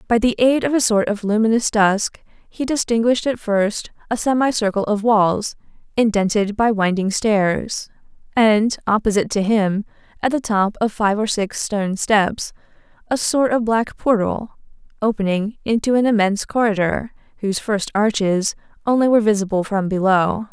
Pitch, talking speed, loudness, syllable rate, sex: 215 Hz, 150 wpm, -19 LUFS, 4.8 syllables/s, female